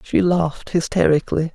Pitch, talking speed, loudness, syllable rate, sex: 165 Hz, 115 wpm, -19 LUFS, 5.5 syllables/s, male